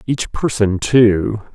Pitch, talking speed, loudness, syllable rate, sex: 110 Hz, 115 wpm, -16 LUFS, 3.0 syllables/s, male